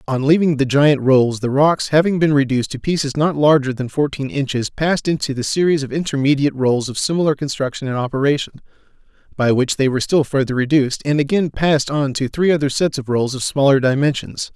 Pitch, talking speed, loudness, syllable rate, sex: 140 Hz, 200 wpm, -17 LUFS, 6.0 syllables/s, male